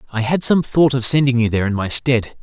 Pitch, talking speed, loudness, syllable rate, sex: 125 Hz, 270 wpm, -16 LUFS, 6.0 syllables/s, male